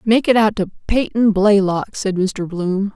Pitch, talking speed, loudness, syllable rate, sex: 205 Hz, 185 wpm, -17 LUFS, 4.2 syllables/s, female